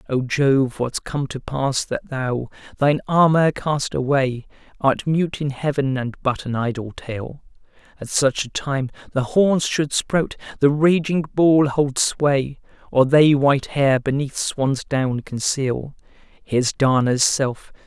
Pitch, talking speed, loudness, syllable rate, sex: 135 Hz, 150 wpm, -20 LUFS, 3.7 syllables/s, male